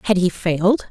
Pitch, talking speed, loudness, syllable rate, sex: 190 Hz, 200 wpm, -19 LUFS, 5.6 syllables/s, female